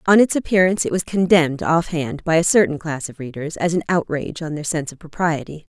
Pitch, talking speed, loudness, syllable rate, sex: 165 Hz, 230 wpm, -19 LUFS, 6.2 syllables/s, female